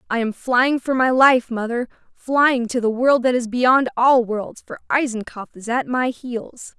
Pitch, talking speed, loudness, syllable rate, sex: 245 Hz, 195 wpm, -19 LUFS, 4.1 syllables/s, female